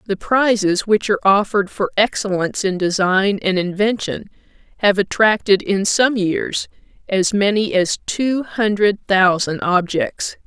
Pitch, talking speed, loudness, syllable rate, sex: 200 Hz, 130 wpm, -17 LUFS, 4.3 syllables/s, female